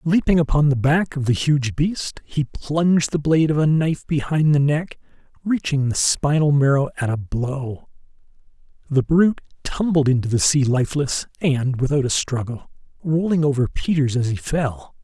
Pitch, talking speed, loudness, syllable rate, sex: 145 Hz, 170 wpm, -20 LUFS, 4.8 syllables/s, male